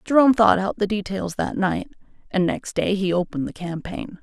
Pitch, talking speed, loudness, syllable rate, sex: 195 Hz, 200 wpm, -22 LUFS, 5.4 syllables/s, female